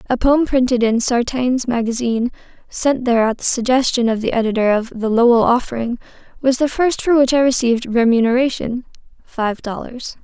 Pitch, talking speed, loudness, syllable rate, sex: 245 Hz, 160 wpm, -17 LUFS, 5.4 syllables/s, female